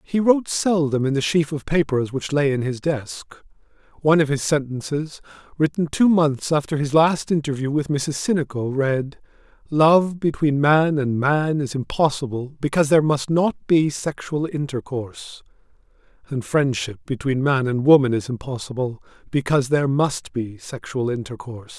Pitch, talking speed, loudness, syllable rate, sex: 140 Hz, 155 wpm, -21 LUFS, 4.9 syllables/s, male